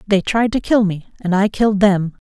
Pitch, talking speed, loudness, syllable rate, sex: 200 Hz, 240 wpm, -17 LUFS, 5.2 syllables/s, female